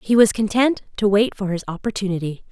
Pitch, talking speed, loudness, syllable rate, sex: 205 Hz, 190 wpm, -20 LUFS, 5.9 syllables/s, female